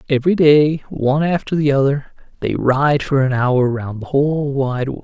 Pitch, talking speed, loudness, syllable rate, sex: 140 Hz, 190 wpm, -17 LUFS, 4.8 syllables/s, male